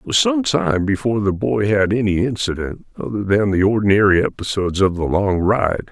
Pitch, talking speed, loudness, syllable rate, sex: 105 Hz, 195 wpm, -18 LUFS, 5.4 syllables/s, male